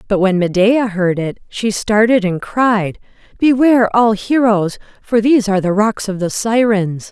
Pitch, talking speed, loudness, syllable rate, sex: 210 Hz, 170 wpm, -14 LUFS, 4.5 syllables/s, female